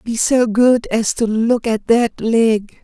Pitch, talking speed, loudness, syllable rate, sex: 225 Hz, 190 wpm, -16 LUFS, 3.2 syllables/s, male